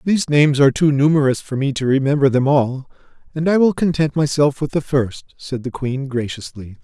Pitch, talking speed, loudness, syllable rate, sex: 140 Hz, 200 wpm, -17 LUFS, 5.5 syllables/s, male